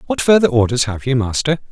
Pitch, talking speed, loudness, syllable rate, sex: 135 Hz, 210 wpm, -16 LUFS, 6.1 syllables/s, male